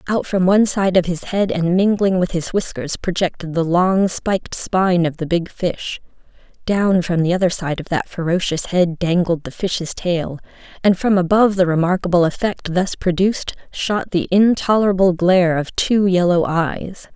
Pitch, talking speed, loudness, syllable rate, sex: 180 Hz, 175 wpm, -18 LUFS, 4.8 syllables/s, female